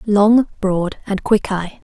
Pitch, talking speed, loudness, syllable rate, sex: 200 Hz, 125 wpm, -17 LUFS, 3.3 syllables/s, female